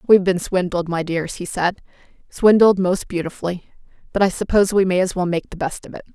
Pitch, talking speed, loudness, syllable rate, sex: 185 Hz, 215 wpm, -19 LUFS, 6.2 syllables/s, female